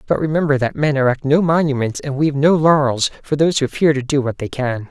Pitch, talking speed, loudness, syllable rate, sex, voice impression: 140 Hz, 245 wpm, -17 LUFS, 6.0 syllables/s, male, masculine, slightly gender-neutral, adult-like, slightly middle-aged, slightly thick, slightly relaxed, weak, slightly dark, slightly soft, slightly muffled, fluent, slightly cool, slightly intellectual, refreshing, sincere, calm, slightly friendly, reassuring, unique, elegant, slightly sweet, slightly kind, very modest